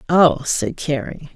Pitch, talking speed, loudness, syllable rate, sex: 145 Hz, 135 wpm, -19 LUFS, 3.6 syllables/s, female